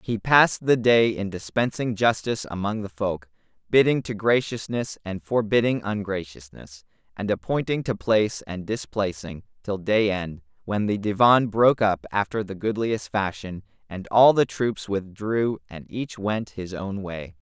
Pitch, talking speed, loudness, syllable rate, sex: 105 Hz, 155 wpm, -23 LUFS, 4.5 syllables/s, male